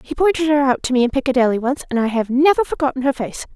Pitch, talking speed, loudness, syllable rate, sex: 270 Hz, 270 wpm, -18 LUFS, 6.9 syllables/s, female